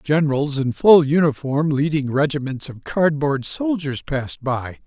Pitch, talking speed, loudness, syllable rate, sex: 145 Hz, 135 wpm, -20 LUFS, 4.4 syllables/s, male